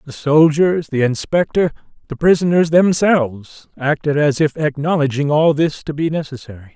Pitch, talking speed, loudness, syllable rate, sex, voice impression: 150 Hz, 140 wpm, -16 LUFS, 5.0 syllables/s, male, masculine, middle-aged, thick, slightly relaxed, powerful, hard, slightly muffled, raspy, cool, calm, mature, friendly, wild, lively, slightly strict, slightly intense